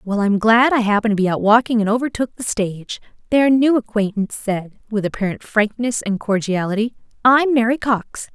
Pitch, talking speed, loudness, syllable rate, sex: 220 Hz, 180 wpm, -18 LUFS, 5.5 syllables/s, female